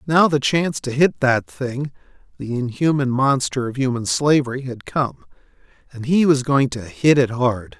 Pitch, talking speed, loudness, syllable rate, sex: 135 Hz, 160 wpm, -19 LUFS, 4.7 syllables/s, male